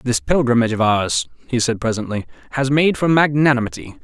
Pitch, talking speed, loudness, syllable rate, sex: 120 Hz, 165 wpm, -18 LUFS, 5.9 syllables/s, male